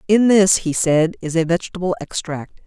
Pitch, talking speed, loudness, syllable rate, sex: 175 Hz, 180 wpm, -17 LUFS, 5.1 syllables/s, female